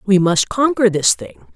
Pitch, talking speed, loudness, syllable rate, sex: 205 Hz, 195 wpm, -15 LUFS, 4.4 syllables/s, female